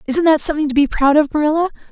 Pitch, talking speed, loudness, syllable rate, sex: 300 Hz, 250 wpm, -15 LUFS, 7.7 syllables/s, female